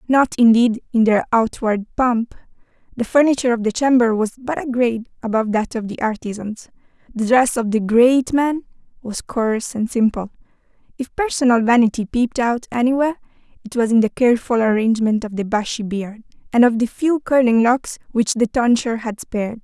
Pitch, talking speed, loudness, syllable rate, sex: 235 Hz, 175 wpm, -18 LUFS, 5.5 syllables/s, female